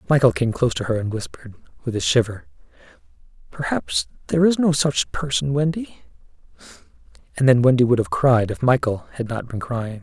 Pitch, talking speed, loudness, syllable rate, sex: 120 Hz, 175 wpm, -20 LUFS, 5.8 syllables/s, male